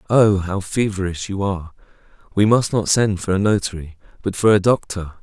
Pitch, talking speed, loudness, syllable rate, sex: 100 Hz, 185 wpm, -19 LUFS, 5.3 syllables/s, male